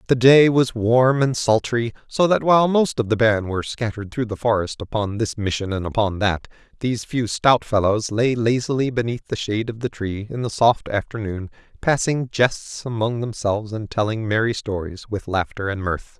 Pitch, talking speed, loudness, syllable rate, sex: 115 Hz, 195 wpm, -21 LUFS, 5.2 syllables/s, male